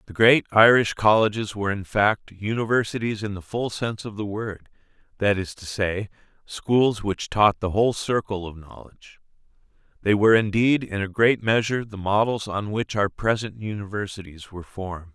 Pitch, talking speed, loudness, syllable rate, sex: 105 Hz, 170 wpm, -23 LUFS, 5.1 syllables/s, male